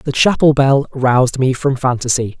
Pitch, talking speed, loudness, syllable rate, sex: 130 Hz, 175 wpm, -14 LUFS, 4.8 syllables/s, male